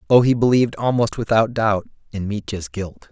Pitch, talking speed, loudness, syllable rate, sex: 110 Hz, 175 wpm, -20 LUFS, 5.3 syllables/s, male